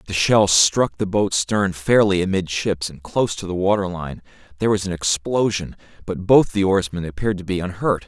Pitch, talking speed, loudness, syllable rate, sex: 95 Hz, 195 wpm, -20 LUFS, 5.3 syllables/s, male